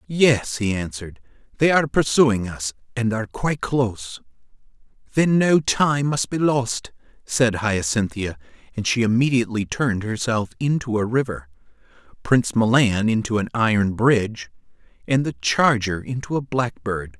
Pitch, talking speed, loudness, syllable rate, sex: 115 Hz, 135 wpm, -21 LUFS, 4.8 syllables/s, male